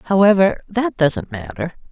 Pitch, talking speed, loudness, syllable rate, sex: 185 Hz, 125 wpm, -17 LUFS, 4.1 syllables/s, female